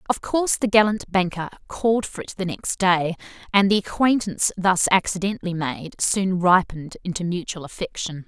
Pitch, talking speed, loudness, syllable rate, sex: 185 Hz, 160 wpm, -22 LUFS, 5.3 syllables/s, female